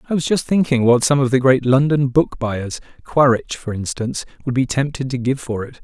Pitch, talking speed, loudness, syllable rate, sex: 130 Hz, 205 wpm, -18 LUFS, 5.4 syllables/s, male